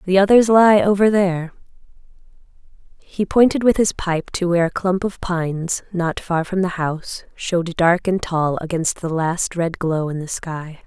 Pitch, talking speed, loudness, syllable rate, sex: 180 Hz, 180 wpm, -19 LUFS, 4.6 syllables/s, female